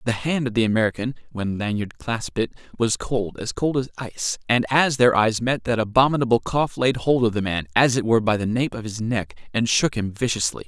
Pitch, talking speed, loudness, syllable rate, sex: 115 Hz, 230 wpm, -22 LUFS, 5.6 syllables/s, male